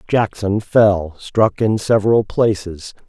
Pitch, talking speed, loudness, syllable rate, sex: 105 Hz, 115 wpm, -16 LUFS, 3.6 syllables/s, male